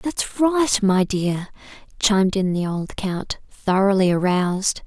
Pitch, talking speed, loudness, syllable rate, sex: 200 Hz, 135 wpm, -20 LUFS, 3.8 syllables/s, female